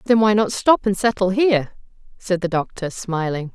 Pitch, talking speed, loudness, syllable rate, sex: 195 Hz, 185 wpm, -19 LUFS, 5.1 syllables/s, female